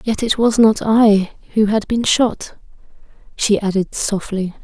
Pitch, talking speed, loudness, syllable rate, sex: 210 Hz, 155 wpm, -16 LUFS, 4.0 syllables/s, female